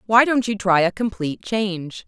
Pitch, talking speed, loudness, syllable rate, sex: 205 Hz, 205 wpm, -20 LUFS, 5.2 syllables/s, female